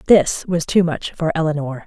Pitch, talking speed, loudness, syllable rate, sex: 160 Hz, 195 wpm, -19 LUFS, 4.9 syllables/s, female